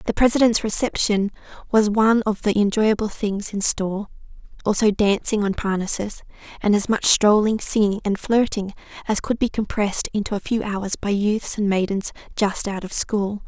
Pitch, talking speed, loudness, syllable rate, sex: 210 Hz, 170 wpm, -21 LUFS, 5.0 syllables/s, female